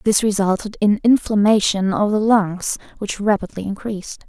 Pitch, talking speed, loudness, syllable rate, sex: 205 Hz, 140 wpm, -18 LUFS, 4.9 syllables/s, female